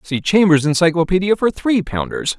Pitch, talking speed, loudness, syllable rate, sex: 175 Hz, 150 wpm, -16 LUFS, 5.2 syllables/s, male